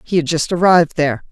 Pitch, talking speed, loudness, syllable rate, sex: 165 Hz, 230 wpm, -15 LUFS, 6.8 syllables/s, female